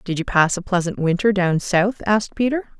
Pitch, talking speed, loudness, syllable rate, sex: 190 Hz, 215 wpm, -19 LUFS, 5.4 syllables/s, female